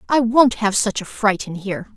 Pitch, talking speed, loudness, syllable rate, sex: 215 Hz, 245 wpm, -18 LUFS, 5.1 syllables/s, female